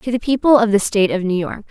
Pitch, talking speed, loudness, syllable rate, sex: 215 Hz, 315 wpm, -16 LUFS, 6.6 syllables/s, female